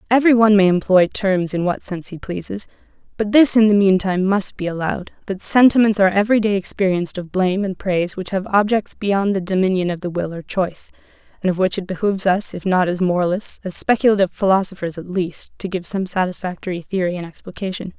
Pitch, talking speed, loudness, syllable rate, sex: 190 Hz, 205 wpm, -18 LUFS, 6.3 syllables/s, female